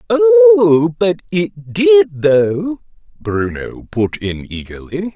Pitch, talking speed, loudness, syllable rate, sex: 145 Hz, 105 wpm, -14 LUFS, 2.7 syllables/s, male